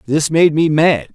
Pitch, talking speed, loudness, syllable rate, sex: 150 Hz, 210 wpm, -13 LUFS, 4.2 syllables/s, male